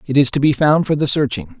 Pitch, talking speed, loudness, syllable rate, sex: 145 Hz, 300 wpm, -16 LUFS, 6.2 syllables/s, male